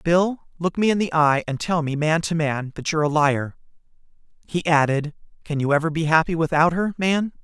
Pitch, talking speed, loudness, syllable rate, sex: 160 Hz, 210 wpm, -21 LUFS, 5.3 syllables/s, male